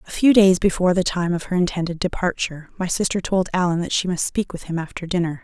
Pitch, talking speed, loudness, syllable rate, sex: 180 Hz, 245 wpm, -21 LUFS, 6.4 syllables/s, female